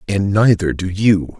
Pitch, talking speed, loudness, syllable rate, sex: 95 Hz, 170 wpm, -16 LUFS, 4.1 syllables/s, male